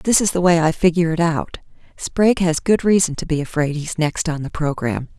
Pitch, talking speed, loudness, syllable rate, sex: 165 Hz, 230 wpm, -18 LUFS, 5.5 syllables/s, female